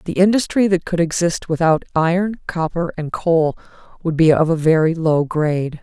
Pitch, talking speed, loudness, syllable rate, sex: 165 Hz, 175 wpm, -18 LUFS, 5.0 syllables/s, female